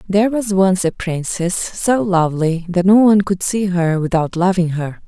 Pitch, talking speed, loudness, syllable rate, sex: 185 Hz, 190 wpm, -16 LUFS, 4.7 syllables/s, female